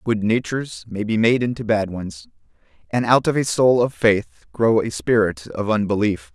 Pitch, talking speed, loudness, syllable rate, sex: 110 Hz, 190 wpm, -20 LUFS, 4.9 syllables/s, male